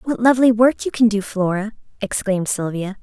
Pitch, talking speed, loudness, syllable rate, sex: 215 Hz, 180 wpm, -18 LUFS, 5.6 syllables/s, female